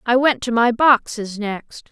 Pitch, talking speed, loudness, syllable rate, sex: 235 Hz, 190 wpm, -18 LUFS, 3.9 syllables/s, female